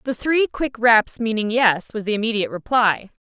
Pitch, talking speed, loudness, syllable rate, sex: 225 Hz, 185 wpm, -19 LUFS, 5.0 syllables/s, female